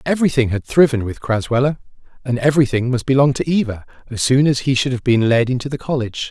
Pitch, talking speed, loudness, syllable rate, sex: 130 Hz, 210 wpm, -17 LUFS, 6.6 syllables/s, male